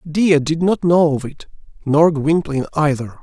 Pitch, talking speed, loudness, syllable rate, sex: 155 Hz, 165 wpm, -16 LUFS, 4.5 syllables/s, male